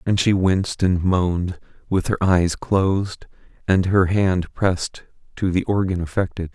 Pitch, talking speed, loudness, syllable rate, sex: 95 Hz, 155 wpm, -20 LUFS, 4.5 syllables/s, male